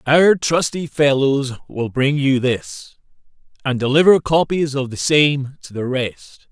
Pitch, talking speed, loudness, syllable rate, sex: 135 Hz, 145 wpm, -17 LUFS, 3.8 syllables/s, male